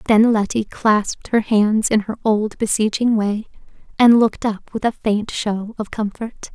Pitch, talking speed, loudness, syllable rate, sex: 215 Hz, 175 wpm, -18 LUFS, 4.4 syllables/s, female